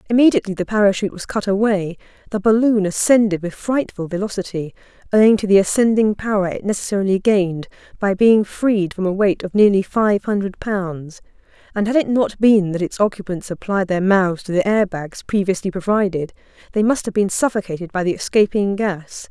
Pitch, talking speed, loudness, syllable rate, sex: 200 Hz, 175 wpm, -18 LUFS, 5.6 syllables/s, female